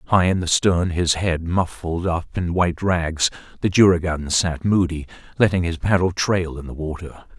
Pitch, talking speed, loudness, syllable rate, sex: 85 Hz, 180 wpm, -20 LUFS, 4.6 syllables/s, male